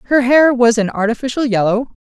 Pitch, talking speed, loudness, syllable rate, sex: 240 Hz, 170 wpm, -14 LUFS, 5.7 syllables/s, female